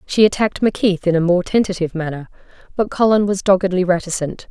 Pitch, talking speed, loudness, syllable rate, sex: 185 Hz, 175 wpm, -17 LUFS, 6.6 syllables/s, female